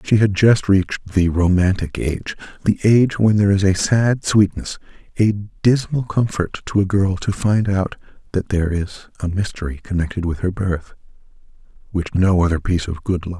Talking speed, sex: 185 wpm, male